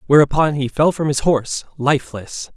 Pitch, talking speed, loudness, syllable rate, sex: 140 Hz, 165 wpm, -18 LUFS, 5.3 syllables/s, male